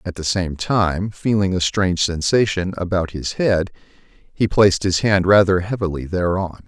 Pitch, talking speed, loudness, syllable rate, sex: 95 Hz, 160 wpm, -19 LUFS, 4.6 syllables/s, male